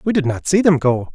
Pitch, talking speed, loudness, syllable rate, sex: 150 Hz, 315 wpm, -16 LUFS, 5.9 syllables/s, male